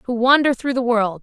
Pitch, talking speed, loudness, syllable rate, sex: 245 Hz, 245 wpm, -17 LUFS, 5.0 syllables/s, female